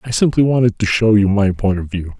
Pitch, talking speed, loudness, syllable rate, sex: 105 Hz, 275 wpm, -15 LUFS, 5.9 syllables/s, male